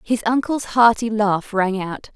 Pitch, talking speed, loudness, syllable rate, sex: 215 Hz, 165 wpm, -19 LUFS, 4.0 syllables/s, female